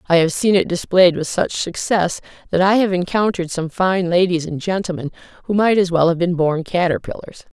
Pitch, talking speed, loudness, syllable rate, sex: 180 Hz, 200 wpm, -18 LUFS, 5.4 syllables/s, female